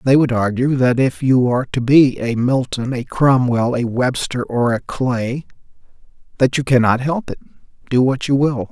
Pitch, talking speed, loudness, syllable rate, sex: 125 Hz, 185 wpm, -17 LUFS, 4.6 syllables/s, male